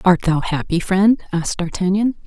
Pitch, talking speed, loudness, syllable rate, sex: 185 Hz, 160 wpm, -18 LUFS, 5.0 syllables/s, female